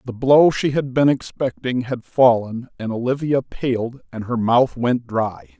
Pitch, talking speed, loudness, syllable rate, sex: 125 Hz, 170 wpm, -19 LUFS, 4.1 syllables/s, male